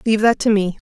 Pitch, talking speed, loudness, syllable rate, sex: 210 Hz, 275 wpm, -17 LUFS, 7.1 syllables/s, female